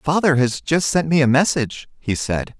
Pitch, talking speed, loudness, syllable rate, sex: 145 Hz, 210 wpm, -18 LUFS, 4.9 syllables/s, male